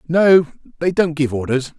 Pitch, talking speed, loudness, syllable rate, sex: 160 Hz, 170 wpm, -17 LUFS, 4.7 syllables/s, male